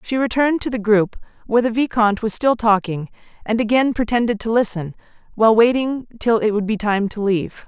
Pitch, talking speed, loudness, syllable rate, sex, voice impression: 225 Hz, 195 wpm, -18 LUFS, 5.9 syllables/s, female, very feminine, young, thin, slightly tensed, slightly weak, bright, soft, clear, fluent, slightly cute, cool, intellectual, very refreshing, sincere, slightly calm, very friendly, reassuring, unique, elegant, slightly wild, sweet, lively, slightly kind, slightly sharp, light